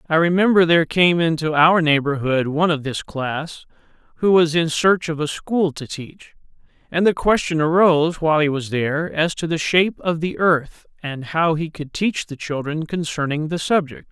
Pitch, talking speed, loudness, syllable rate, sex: 160 Hz, 190 wpm, -19 LUFS, 4.9 syllables/s, male